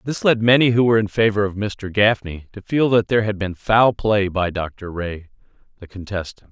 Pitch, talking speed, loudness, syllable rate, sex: 105 Hz, 210 wpm, -19 LUFS, 5.1 syllables/s, male